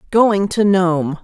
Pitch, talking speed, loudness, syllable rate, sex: 190 Hz, 145 wpm, -15 LUFS, 3.0 syllables/s, female